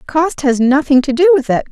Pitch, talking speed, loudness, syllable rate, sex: 285 Hz, 245 wpm, -13 LUFS, 5.4 syllables/s, female